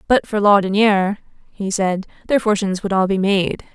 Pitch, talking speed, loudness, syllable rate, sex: 200 Hz, 175 wpm, -18 LUFS, 5.4 syllables/s, female